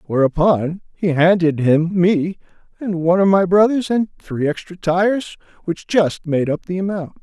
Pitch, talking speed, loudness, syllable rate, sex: 180 Hz, 165 wpm, -18 LUFS, 4.6 syllables/s, male